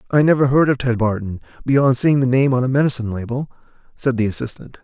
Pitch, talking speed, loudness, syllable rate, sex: 125 Hz, 210 wpm, -18 LUFS, 6.4 syllables/s, male